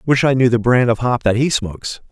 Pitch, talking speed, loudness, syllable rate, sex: 120 Hz, 285 wpm, -16 LUFS, 5.7 syllables/s, male